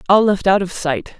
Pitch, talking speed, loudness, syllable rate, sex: 180 Hz, 250 wpm, -16 LUFS, 5.1 syllables/s, female